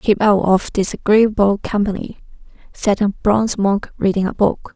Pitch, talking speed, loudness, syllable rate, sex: 200 Hz, 150 wpm, -17 LUFS, 4.7 syllables/s, female